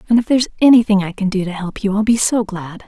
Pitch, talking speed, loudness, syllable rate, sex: 210 Hz, 290 wpm, -16 LUFS, 6.6 syllables/s, female